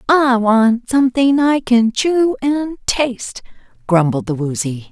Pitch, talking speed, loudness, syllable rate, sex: 240 Hz, 135 wpm, -15 LUFS, 3.8 syllables/s, female